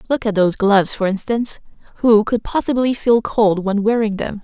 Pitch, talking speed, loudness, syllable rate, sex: 215 Hz, 190 wpm, -17 LUFS, 5.5 syllables/s, female